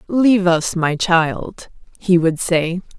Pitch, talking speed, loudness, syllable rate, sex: 175 Hz, 140 wpm, -16 LUFS, 3.3 syllables/s, female